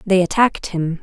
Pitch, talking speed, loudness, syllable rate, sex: 185 Hz, 175 wpm, -18 LUFS, 5.5 syllables/s, female